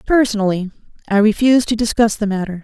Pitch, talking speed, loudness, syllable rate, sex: 215 Hz, 160 wpm, -16 LUFS, 6.7 syllables/s, female